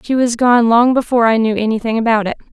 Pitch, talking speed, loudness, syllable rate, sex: 230 Hz, 255 wpm, -14 LUFS, 6.6 syllables/s, female